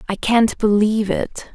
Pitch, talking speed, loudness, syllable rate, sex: 215 Hz, 155 wpm, -17 LUFS, 4.4 syllables/s, female